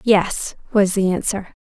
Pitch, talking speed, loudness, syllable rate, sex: 195 Hz, 145 wpm, -19 LUFS, 3.9 syllables/s, female